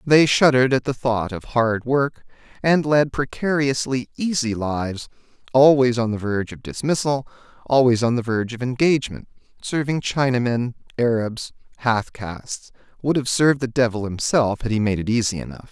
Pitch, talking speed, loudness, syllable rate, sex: 125 Hz, 155 wpm, -21 LUFS, 5.2 syllables/s, male